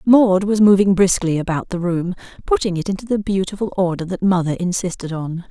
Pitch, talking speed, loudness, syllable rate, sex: 185 Hz, 185 wpm, -18 LUFS, 5.7 syllables/s, female